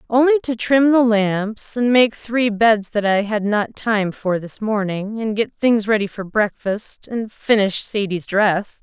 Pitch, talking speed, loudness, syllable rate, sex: 215 Hz, 185 wpm, -18 LUFS, 3.9 syllables/s, female